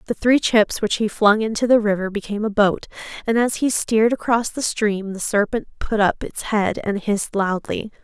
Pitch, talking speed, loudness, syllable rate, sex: 215 Hz, 210 wpm, -20 LUFS, 5.1 syllables/s, female